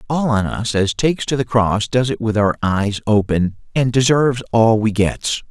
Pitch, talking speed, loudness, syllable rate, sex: 115 Hz, 205 wpm, -17 LUFS, 4.7 syllables/s, male